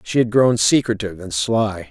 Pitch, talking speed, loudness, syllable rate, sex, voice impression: 110 Hz, 190 wpm, -18 LUFS, 5.0 syllables/s, male, masculine, very adult-like, slightly intellectual, sincere, slightly calm, slightly wild